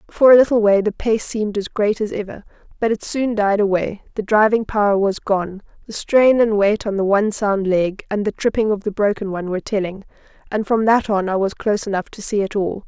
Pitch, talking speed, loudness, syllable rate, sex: 205 Hz, 240 wpm, -18 LUFS, 5.7 syllables/s, female